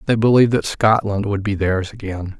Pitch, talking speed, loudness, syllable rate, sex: 105 Hz, 200 wpm, -18 LUFS, 5.4 syllables/s, male